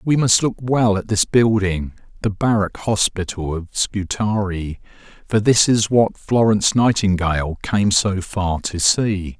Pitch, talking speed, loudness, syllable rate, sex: 100 Hz, 145 wpm, -18 LUFS, 4.0 syllables/s, male